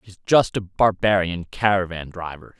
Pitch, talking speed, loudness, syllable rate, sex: 95 Hz, 140 wpm, -21 LUFS, 4.6 syllables/s, male